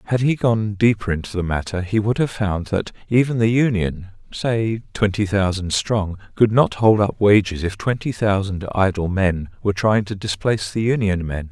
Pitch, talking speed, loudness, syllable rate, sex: 100 Hz, 190 wpm, -20 LUFS, 4.9 syllables/s, male